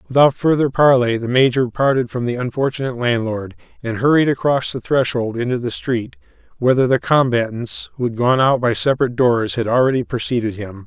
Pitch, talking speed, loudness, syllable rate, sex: 125 Hz, 175 wpm, -17 LUFS, 5.6 syllables/s, male